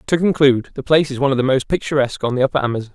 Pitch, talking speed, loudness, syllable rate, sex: 135 Hz, 285 wpm, -17 LUFS, 8.7 syllables/s, male